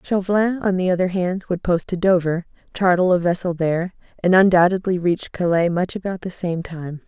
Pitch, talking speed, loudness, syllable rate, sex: 180 Hz, 185 wpm, -20 LUFS, 5.4 syllables/s, female